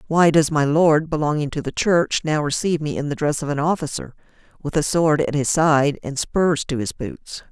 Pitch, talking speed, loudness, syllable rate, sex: 150 Hz, 225 wpm, -20 LUFS, 5.0 syllables/s, female